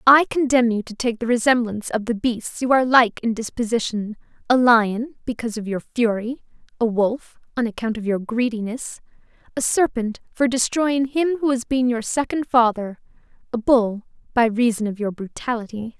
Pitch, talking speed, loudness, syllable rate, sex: 235 Hz, 160 wpm, -21 LUFS, 5.1 syllables/s, female